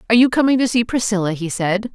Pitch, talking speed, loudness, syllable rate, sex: 220 Hz, 245 wpm, -17 LUFS, 6.9 syllables/s, female